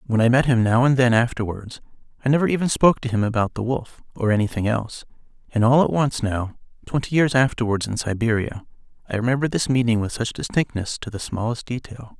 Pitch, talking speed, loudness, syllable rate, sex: 120 Hz, 200 wpm, -21 LUFS, 6.1 syllables/s, male